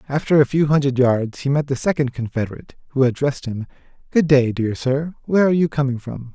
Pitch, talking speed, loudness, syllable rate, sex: 135 Hz, 210 wpm, -19 LUFS, 6.3 syllables/s, male